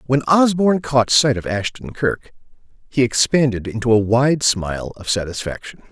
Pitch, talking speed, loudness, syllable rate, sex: 125 Hz, 150 wpm, -18 LUFS, 4.9 syllables/s, male